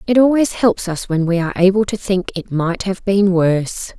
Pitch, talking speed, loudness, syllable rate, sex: 190 Hz, 225 wpm, -17 LUFS, 5.0 syllables/s, female